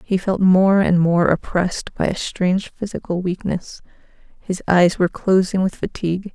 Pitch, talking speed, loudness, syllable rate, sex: 185 Hz, 160 wpm, -19 LUFS, 4.8 syllables/s, female